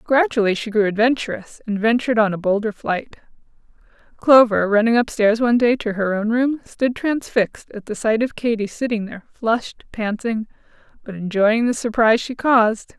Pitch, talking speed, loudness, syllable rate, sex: 225 Hz, 170 wpm, -19 LUFS, 5.3 syllables/s, female